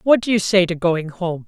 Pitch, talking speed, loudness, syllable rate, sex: 180 Hz, 285 wpm, -18 LUFS, 5.1 syllables/s, female